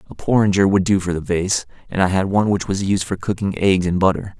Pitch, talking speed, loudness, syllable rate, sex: 95 Hz, 260 wpm, -18 LUFS, 6.1 syllables/s, male